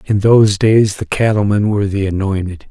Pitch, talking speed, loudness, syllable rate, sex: 100 Hz, 180 wpm, -14 LUFS, 5.4 syllables/s, male